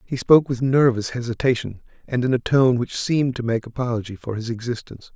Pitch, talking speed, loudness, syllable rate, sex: 120 Hz, 200 wpm, -21 LUFS, 6.0 syllables/s, male